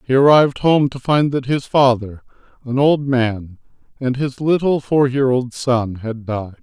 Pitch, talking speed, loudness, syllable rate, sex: 130 Hz, 180 wpm, -17 LUFS, 4.3 syllables/s, male